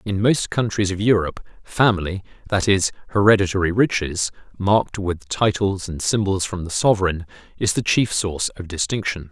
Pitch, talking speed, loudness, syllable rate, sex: 100 Hz, 155 wpm, -20 LUFS, 5.3 syllables/s, male